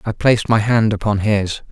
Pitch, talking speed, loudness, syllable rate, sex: 105 Hz, 210 wpm, -16 LUFS, 5.1 syllables/s, male